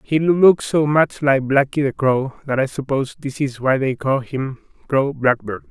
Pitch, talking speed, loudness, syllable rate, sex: 135 Hz, 200 wpm, -19 LUFS, 4.4 syllables/s, male